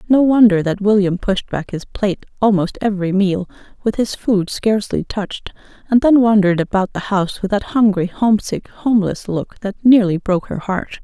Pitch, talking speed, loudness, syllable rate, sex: 205 Hz, 180 wpm, -17 LUFS, 5.4 syllables/s, female